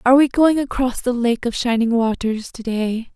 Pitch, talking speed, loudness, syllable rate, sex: 240 Hz, 190 wpm, -19 LUFS, 5.0 syllables/s, female